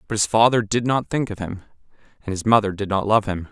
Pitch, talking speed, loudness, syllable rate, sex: 105 Hz, 255 wpm, -20 LUFS, 6.0 syllables/s, male